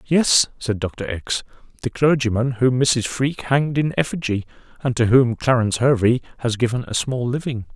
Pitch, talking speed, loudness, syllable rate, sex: 125 Hz, 170 wpm, -20 LUFS, 5.1 syllables/s, male